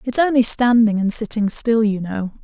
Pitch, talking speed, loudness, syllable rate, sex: 220 Hz, 195 wpm, -17 LUFS, 4.9 syllables/s, female